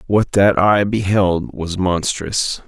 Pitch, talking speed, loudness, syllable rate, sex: 95 Hz, 135 wpm, -17 LUFS, 3.3 syllables/s, male